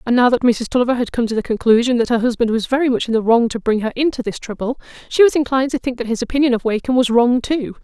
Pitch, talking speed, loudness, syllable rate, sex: 240 Hz, 290 wpm, -17 LUFS, 7.0 syllables/s, female